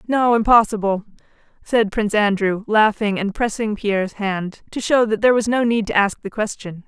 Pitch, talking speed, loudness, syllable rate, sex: 210 Hz, 185 wpm, -19 LUFS, 5.1 syllables/s, female